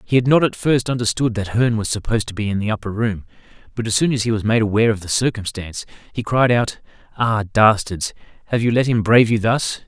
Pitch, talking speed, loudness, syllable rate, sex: 110 Hz, 230 wpm, -18 LUFS, 6.3 syllables/s, male